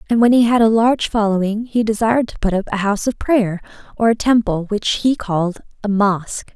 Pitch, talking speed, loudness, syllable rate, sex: 215 Hz, 220 wpm, -17 LUFS, 5.6 syllables/s, female